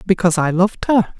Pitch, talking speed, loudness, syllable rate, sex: 190 Hz, 200 wpm, -16 LUFS, 6.6 syllables/s, female